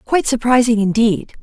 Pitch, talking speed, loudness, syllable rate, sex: 230 Hz, 125 wpm, -15 LUFS, 5.6 syllables/s, female